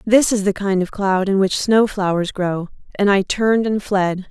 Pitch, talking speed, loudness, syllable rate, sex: 200 Hz, 225 wpm, -18 LUFS, 4.6 syllables/s, female